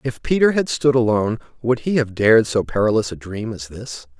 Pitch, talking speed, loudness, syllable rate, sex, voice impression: 120 Hz, 215 wpm, -19 LUFS, 5.6 syllables/s, male, masculine, very adult-like, slightly middle-aged, thick, tensed, slightly powerful, bright, slightly clear, fluent, very intellectual, slightly refreshing, very sincere, very calm, mature, friendly, very reassuring, elegant, slightly wild, sweet, lively, kind, slightly sharp, slightly modest